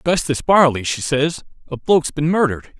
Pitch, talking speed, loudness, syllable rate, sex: 150 Hz, 170 wpm, -17 LUFS, 5.4 syllables/s, male